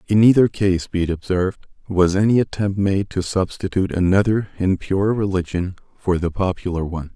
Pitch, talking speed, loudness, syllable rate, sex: 95 Hz, 170 wpm, -20 LUFS, 5.6 syllables/s, male